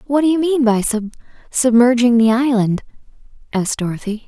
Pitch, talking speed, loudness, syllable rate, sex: 240 Hz, 170 wpm, -16 LUFS, 5.5 syllables/s, female